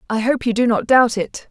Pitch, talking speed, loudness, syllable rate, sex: 235 Hz, 280 wpm, -17 LUFS, 5.3 syllables/s, female